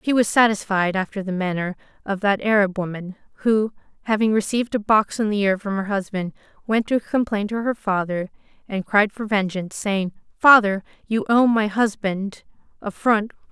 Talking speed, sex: 180 wpm, female